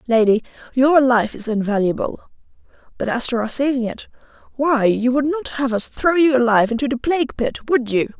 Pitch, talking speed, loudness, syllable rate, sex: 250 Hz, 190 wpm, -18 LUFS, 5.3 syllables/s, female